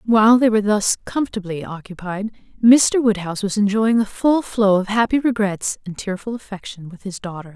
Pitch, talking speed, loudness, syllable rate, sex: 210 Hz, 175 wpm, -18 LUFS, 5.5 syllables/s, female